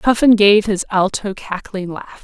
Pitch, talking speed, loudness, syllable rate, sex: 200 Hz, 160 wpm, -16 LUFS, 4.1 syllables/s, female